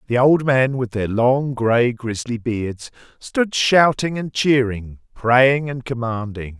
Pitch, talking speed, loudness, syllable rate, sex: 125 Hz, 145 wpm, -19 LUFS, 3.5 syllables/s, male